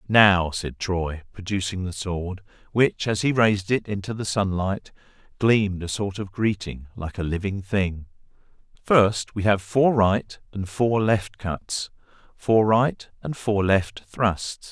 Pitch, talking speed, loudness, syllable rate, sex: 100 Hz, 155 wpm, -23 LUFS, 3.8 syllables/s, male